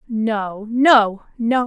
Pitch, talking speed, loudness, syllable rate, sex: 225 Hz, 110 wpm, -18 LUFS, 2.1 syllables/s, female